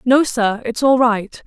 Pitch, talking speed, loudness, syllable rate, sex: 235 Hz, 205 wpm, -16 LUFS, 3.8 syllables/s, female